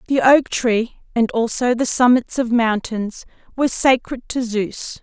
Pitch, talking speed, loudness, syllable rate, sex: 235 Hz, 155 wpm, -18 LUFS, 4.1 syllables/s, female